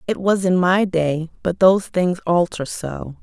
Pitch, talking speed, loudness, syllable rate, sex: 180 Hz, 185 wpm, -19 LUFS, 4.2 syllables/s, female